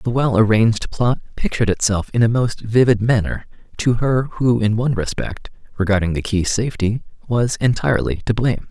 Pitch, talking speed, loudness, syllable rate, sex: 110 Hz, 170 wpm, -18 LUFS, 5.5 syllables/s, male